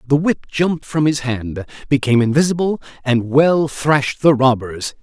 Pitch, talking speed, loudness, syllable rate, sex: 140 Hz, 155 wpm, -17 LUFS, 4.9 syllables/s, male